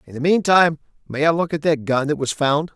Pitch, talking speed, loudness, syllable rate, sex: 150 Hz, 260 wpm, -19 LUFS, 6.0 syllables/s, male